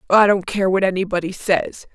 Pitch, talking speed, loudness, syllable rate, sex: 190 Hz, 185 wpm, -18 LUFS, 5.4 syllables/s, female